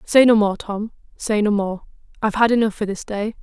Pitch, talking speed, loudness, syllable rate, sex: 215 Hz, 230 wpm, -19 LUFS, 5.6 syllables/s, female